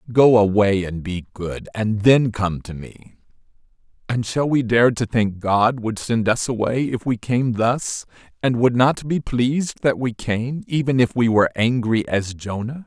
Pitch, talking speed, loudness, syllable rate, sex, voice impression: 115 Hz, 185 wpm, -20 LUFS, 4.2 syllables/s, male, masculine, adult-like, slightly thick, fluent, cool, slightly intellectual, friendly